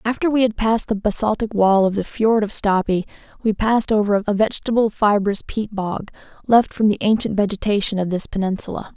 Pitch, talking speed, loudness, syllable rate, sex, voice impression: 210 Hz, 190 wpm, -19 LUFS, 5.7 syllables/s, female, feminine, slightly adult-like, slightly refreshing, slightly sincere, slightly friendly